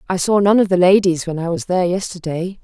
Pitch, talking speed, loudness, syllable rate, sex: 180 Hz, 250 wpm, -16 LUFS, 6.1 syllables/s, female